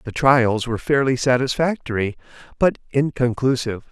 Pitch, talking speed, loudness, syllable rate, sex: 125 Hz, 105 wpm, -20 LUFS, 5.3 syllables/s, male